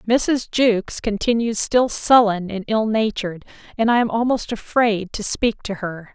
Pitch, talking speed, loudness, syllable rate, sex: 215 Hz, 165 wpm, -20 LUFS, 4.5 syllables/s, female